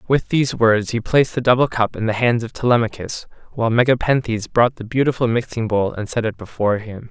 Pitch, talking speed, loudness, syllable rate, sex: 115 Hz, 210 wpm, -19 LUFS, 6.0 syllables/s, male